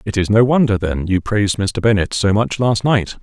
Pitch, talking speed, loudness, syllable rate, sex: 105 Hz, 240 wpm, -16 LUFS, 5.2 syllables/s, male